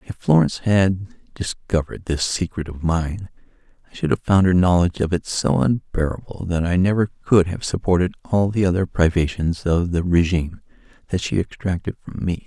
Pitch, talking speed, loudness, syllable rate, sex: 90 Hz, 175 wpm, -20 LUFS, 5.4 syllables/s, male